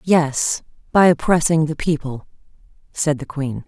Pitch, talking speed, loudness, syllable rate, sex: 155 Hz, 130 wpm, -19 LUFS, 4.2 syllables/s, female